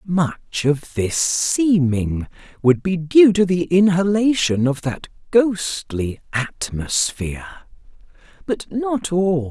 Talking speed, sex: 100 wpm, male